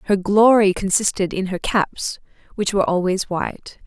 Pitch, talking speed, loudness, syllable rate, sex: 195 Hz, 155 wpm, -19 LUFS, 4.9 syllables/s, female